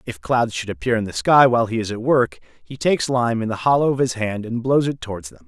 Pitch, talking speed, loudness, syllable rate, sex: 115 Hz, 285 wpm, -20 LUFS, 6.1 syllables/s, male